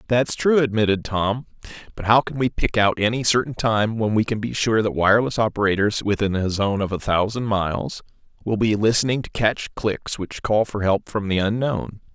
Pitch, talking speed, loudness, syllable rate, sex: 110 Hz, 205 wpm, -21 LUFS, 5.2 syllables/s, male